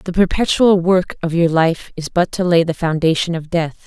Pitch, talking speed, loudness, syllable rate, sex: 170 Hz, 220 wpm, -16 LUFS, 4.8 syllables/s, female